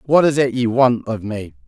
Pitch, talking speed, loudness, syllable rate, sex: 120 Hz, 250 wpm, -17 LUFS, 4.9 syllables/s, male